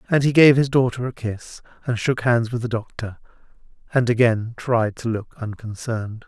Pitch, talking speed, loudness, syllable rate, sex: 120 Hz, 180 wpm, -21 LUFS, 5.0 syllables/s, male